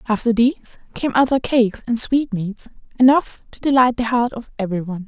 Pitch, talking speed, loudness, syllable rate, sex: 235 Hz, 175 wpm, -18 LUFS, 5.9 syllables/s, female